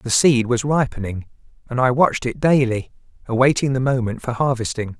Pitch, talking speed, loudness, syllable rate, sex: 125 Hz, 170 wpm, -19 LUFS, 5.4 syllables/s, male